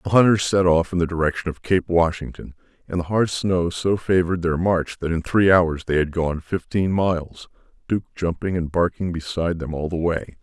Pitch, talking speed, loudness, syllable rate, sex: 85 Hz, 205 wpm, -21 LUFS, 5.2 syllables/s, male